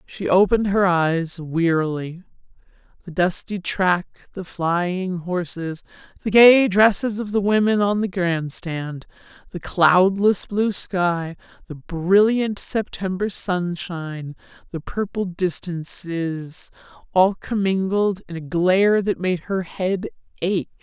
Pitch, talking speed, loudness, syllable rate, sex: 180 Hz, 120 wpm, -21 LUFS, 3.6 syllables/s, female